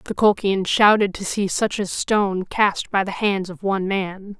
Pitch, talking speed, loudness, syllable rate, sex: 195 Hz, 205 wpm, -20 LUFS, 4.4 syllables/s, female